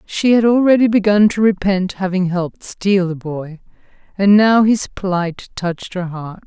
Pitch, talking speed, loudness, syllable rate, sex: 195 Hz, 165 wpm, -16 LUFS, 4.4 syllables/s, female